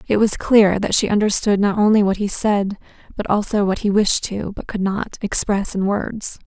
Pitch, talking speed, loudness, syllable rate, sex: 205 Hz, 210 wpm, -18 LUFS, 4.8 syllables/s, female